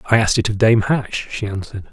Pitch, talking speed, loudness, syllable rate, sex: 110 Hz, 250 wpm, -18 LUFS, 6.8 syllables/s, male